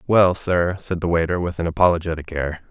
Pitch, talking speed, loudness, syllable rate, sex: 85 Hz, 200 wpm, -20 LUFS, 5.7 syllables/s, male